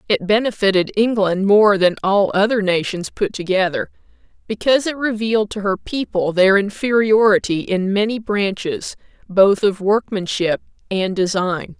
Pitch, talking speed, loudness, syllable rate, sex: 200 Hz, 130 wpm, -17 LUFS, 4.6 syllables/s, female